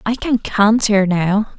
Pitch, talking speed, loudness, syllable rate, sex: 210 Hz, 150 wpm, -15 LUFS, 3.7 syllables/s, female